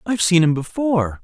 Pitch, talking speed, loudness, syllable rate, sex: 180 Hz, 245 wpm, -18 LUFS, 6.4 syllables/s, male